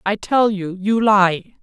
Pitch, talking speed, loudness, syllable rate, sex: 200 Hz, 185 wpm, -17 LUFS, 3.5 syllables/s, female